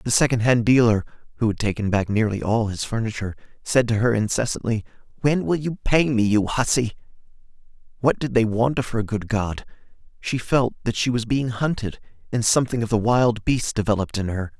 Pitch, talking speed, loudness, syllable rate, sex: 115 Hz, 190 wpm, -22 LUFS, 5.7 syllables/s, male